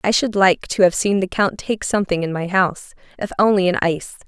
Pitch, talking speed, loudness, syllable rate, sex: 190 Hz, 240 wpm, -18 LUFS, 6.0 syllables/s, female